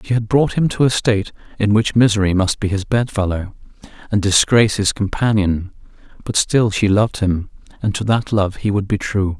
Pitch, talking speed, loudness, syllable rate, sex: 105 Hz, 200 wpm, -17 LUFS, 5.3 syllables/s, male